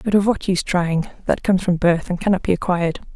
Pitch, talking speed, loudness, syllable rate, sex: 185 Hz, 245 wpm, -19 LUFS, 6.5 syllables/s, female